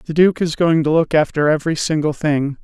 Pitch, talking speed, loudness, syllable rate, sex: 155 Hz, 225 wpm, -17 LUFS, 5.5 syllables/s, male